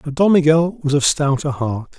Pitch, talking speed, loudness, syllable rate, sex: 145 Hz, 210 wpm, -17 LUFS, 4.9 syllables/s, male